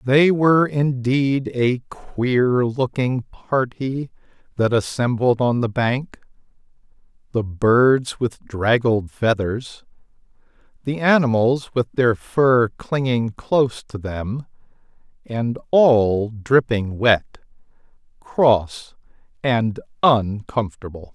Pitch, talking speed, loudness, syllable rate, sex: 120 Hz, 90 wpm, -20 LUFS, 3.1 syllables/s, male